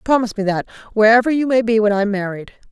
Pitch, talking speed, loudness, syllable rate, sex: 220 Hz, 220 wpm, -17 LUFS, 6.6 syllables/s, female